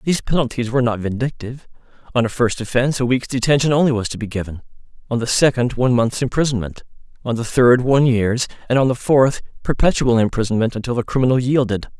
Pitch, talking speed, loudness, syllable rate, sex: 125 Hz, 190 wpm, -18 LUFS, 6.6 syllables/s, male